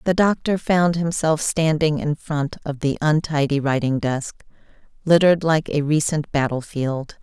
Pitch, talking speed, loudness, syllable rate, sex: 155 Hz, 140 wpm, -20 LUFS, 4.5 syllables/s, female